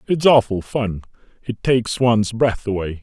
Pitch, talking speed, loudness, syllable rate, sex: 115 Hz, 160 wpm, -18 LUFS, 4.9 syllables/s, male